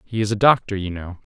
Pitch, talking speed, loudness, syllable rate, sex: 105 Hz, 265 wpm, -20 LUFS, 6.3 syllables/s, male